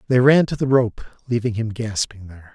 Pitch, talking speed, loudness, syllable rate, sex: 115 Hz, 210 wpm, -20 LUFS, 5.4 syllables/s, male